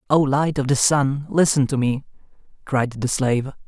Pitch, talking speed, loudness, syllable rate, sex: 135 Hz, 180 wpm, -20 LUFS, 4.8 syllables/s, male